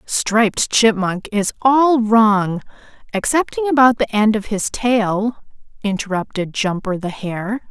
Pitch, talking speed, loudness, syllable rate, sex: 220 Hz, 125 wpm, -17 LUFS, 3.9 syllables/s, female